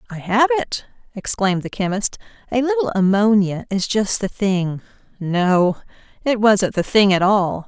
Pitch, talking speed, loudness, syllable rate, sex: 205 Hz, 150 wpm, -18 LUFS, 4.4 syllables/s, female